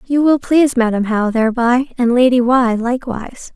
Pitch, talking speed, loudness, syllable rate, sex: 245 Hz, 170 wpm, -14 LUFS, 5.4 syllables/s, female